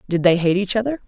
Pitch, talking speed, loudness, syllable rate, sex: 200 Hz, 280 wpm, -19 LUFS, 6.8 syllables/s, female